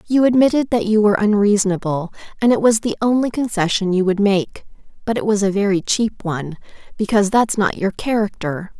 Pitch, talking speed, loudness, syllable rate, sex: 205 Hz, 185 wpm, -17 LUFS, 5.8 syllables/s, female